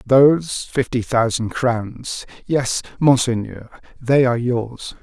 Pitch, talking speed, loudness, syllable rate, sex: 125 Hz, 110 wpm, -19 LUFS, 3.5 syllables/s, male